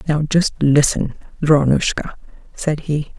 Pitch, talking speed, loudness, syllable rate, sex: 150 Hz, 115 wpm, -18 LUFS, 4.0 syllables/s, female